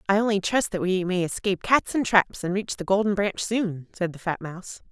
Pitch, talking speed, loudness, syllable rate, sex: 195 Hz, 245 wpm, -24 LUFS, 5.4 syllables/s, female